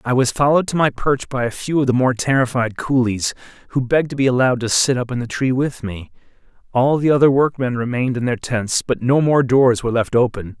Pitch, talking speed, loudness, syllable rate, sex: 125 Hz, 240 wpm, -18 LUFS, 5.9 syllables/s, male